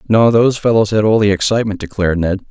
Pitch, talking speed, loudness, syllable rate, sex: 105 Hz, 215 wpm, -14 LUFS, 7.0 syllables/s, male